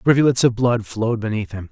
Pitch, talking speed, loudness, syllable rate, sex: 115 Hz, 210 wpm, -19 LUFS, 6.3 syllables/s, male